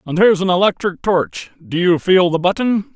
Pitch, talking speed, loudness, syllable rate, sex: 185 Hz, 205 wpm, -16 LUFS, 5.3 syllables/s, male